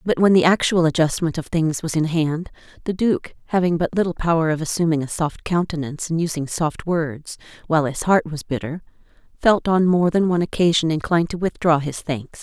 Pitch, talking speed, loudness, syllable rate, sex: 165 Hz, 200 wpm, -20 LUFS, 5.6 syllables/s, female